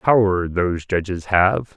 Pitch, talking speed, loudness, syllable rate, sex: 95 Hz, 135 wpm, -19 LUFS, 4.1 syllables/s, male